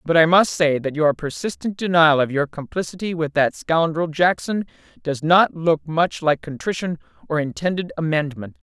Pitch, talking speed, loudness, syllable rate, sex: 160 Hz, 165 wpm, -20 LUFS, 4.8 syllables/s, female